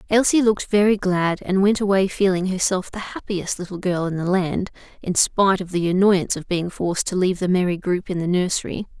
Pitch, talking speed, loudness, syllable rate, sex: 185 Hz, 215 wpm, -21 LUFS, 5.7 syllables/s, female